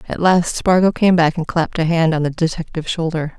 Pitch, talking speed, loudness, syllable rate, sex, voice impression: 165 Hz, 230 wpm, -17 LUFS, 5.9 syllables/s, female, very feminine, adult-like, slightly intellectual, slightly calm